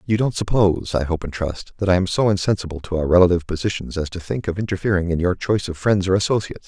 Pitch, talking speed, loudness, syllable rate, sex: 90 Hz, 250 wpm, -20 LUFS, 6.9 syllables/s, male